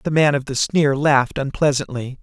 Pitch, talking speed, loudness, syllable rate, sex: 140 Hz, 190 wpm, -18 LUFS, 5.2 syllables/s, male